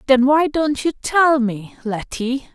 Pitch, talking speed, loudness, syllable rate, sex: 265 Hz, 165 wpm, -18 LUFS, 3.6 syllables/s, female